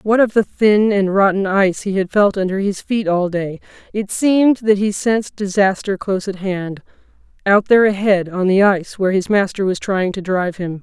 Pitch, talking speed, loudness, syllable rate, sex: 195 Hz, 210 wpm, -16 LUFS, 5.3 syllables/s, female